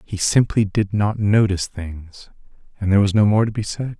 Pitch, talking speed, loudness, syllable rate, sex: 100 Hz, 210 wpm, -19 LUFS, 5.3 syllables/s, male